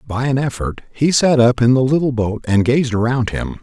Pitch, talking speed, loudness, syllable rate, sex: 125 Hz, 230 wpm, -16 LUFS, 5.2 syllables/s, male